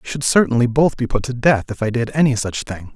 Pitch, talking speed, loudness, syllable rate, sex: 125 Hz, 285 wpm, -18 LUFS, 6.1 syllables/s, male